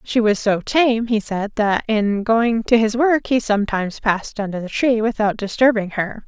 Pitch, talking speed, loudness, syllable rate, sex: 220 Hz, 200 wpm, -19 LUFS, 4.7 syllables/s, female